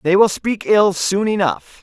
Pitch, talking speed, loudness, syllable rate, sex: 195 Hz, 195 wpm, -16 LUFS, 4.1 syllables/s, male